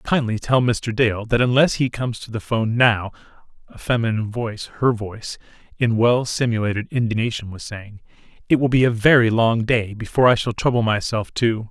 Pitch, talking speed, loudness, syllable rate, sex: 115 Hz, 185 wpm, -20 LUFS, 5.6 syllables/s, male